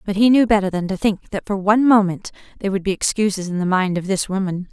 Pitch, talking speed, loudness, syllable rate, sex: 195 Hz, 265 wpm, -19 LUFS, 6.3 syllables/s, female